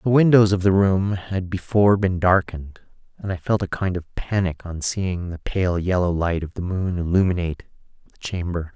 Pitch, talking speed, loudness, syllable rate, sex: 90 Hz, 190 wpm, -21 LUFS, 5.1 syllables/s, male